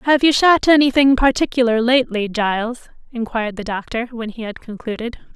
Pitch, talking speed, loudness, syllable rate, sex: 240 Hz, 155 wpm, -17 LUFS, 5.6 syllables/s, female